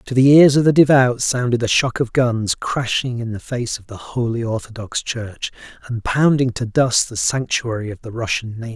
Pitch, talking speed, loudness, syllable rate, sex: 120 Hz, 205 wpm, -18 LUFS, 4.9 syllables/s, male